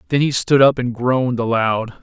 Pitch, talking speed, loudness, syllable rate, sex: 125 Hz, 210 wpm, -17 LUFS, 5.0 syllables/s, male